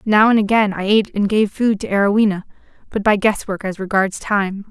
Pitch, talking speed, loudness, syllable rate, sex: 205 Hz, 215 wpm, -17 LUFS, 5.6 syllables/s, female